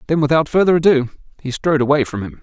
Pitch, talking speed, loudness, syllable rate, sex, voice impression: 145 Hz, 225 wpm, -16 LUFS, 7.1 syllables/s, male, masculine, adult-like, slightly fluent, refreshing, unique